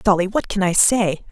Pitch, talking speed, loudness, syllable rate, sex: 195 Hz, 230 wpm, -18 LUFS, 5.1 syllables/s, female